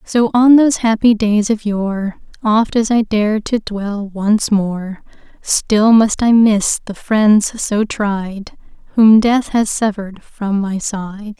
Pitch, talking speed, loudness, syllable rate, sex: 215 Hz, 160 wpm, -15 LUFS, 3.3 syllables/s, female